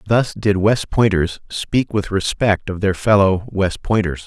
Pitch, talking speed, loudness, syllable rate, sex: 100 Hz, 170 wpm, -18 LUFS, 4.1 syllables/s, male